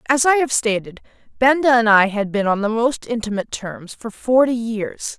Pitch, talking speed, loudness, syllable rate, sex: 230 Hz, 195 wpm, -18 LUFS, 5.0 syllables/s, female